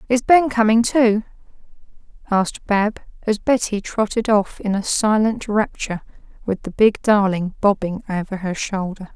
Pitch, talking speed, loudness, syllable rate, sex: 210 Hz, 145 wpm, -19 LUFS, 4.6 syllables/s, female